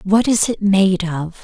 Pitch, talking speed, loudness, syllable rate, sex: 195 Hz, 210 wpm, -16 LUFS, 3.8 syllables/s, female